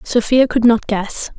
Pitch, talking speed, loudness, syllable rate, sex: 230 Hz, 175 wpm, -15 LUFS, 4.0 syllables/s, female